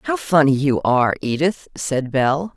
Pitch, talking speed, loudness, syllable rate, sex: 150 Hz, 165 wpm, -18 LUFS, 4.7 syllables/s, female